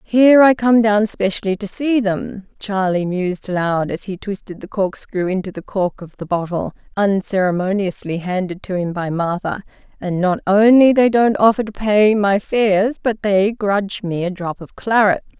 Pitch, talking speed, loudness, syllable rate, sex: 200 Hz, 180 wpm, -17 LUFS, 4.8 syllables/s, female